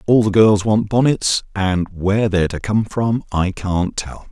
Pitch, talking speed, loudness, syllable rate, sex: 100 Hz, 195 wpm, -17 LUFS, 4.4 syllables/s, male